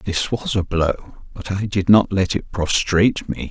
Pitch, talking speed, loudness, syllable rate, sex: 95 Hz, 205 wpm, -19 LUFS, 4.1 syllables/s, male